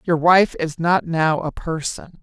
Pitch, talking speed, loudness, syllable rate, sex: 165 Hz, 190 wpm, -19 LUFS, 3.9 syllables/s, female